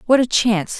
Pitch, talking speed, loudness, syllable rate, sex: 225 Hz, 225 wpm, -17 LUFS, 6.4 syllables/s, female